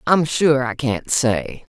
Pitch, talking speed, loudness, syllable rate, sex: 130 Hz, 170 wpm, -19 LUFS, 3.3 syllables/s, female